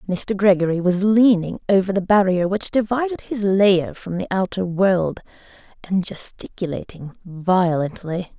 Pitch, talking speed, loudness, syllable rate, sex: 190 Hz, 130 wpm, -20 LUFS, 4.3 syllables/s, female